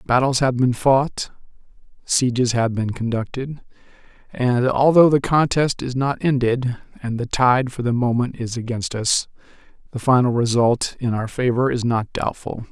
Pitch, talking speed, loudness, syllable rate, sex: 125 Hz, 155 wpm, -20 LUFS, 4.4 syllables/s, male